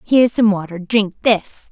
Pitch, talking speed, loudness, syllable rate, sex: 205 Hz, 175 wpm, -16 LUFS, 4.6 syllables/s, female